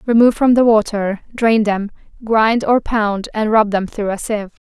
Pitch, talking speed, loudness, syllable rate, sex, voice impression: 215 Hz, 195 wpm, -16 LUFS, 4.8 syllables/s, female, very feminine, young, slightly adult-like, thin, slightly relaxed, slightly powerful, slightly dark, slightly soft, very clear, fluent, very cute, intellectual, very refreshing, sincere, calm, friendly, reassuring, very unique, elegant, very sweet, slightly lively, very kind, slightly sharp, modest, light